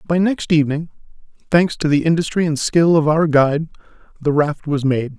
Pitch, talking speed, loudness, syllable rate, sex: 155 Hz, 185 wpm, -17 LUFS, 5.3 syllables/s, male